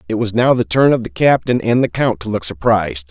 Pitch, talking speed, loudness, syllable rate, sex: 110 Hz, 270 wpm, -15 LUFS, 5.8 syllables/s, male